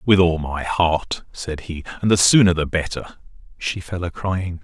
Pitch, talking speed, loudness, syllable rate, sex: 90 Hz, 195 wpm, -20 LUFS, 4.4 syllables/s, male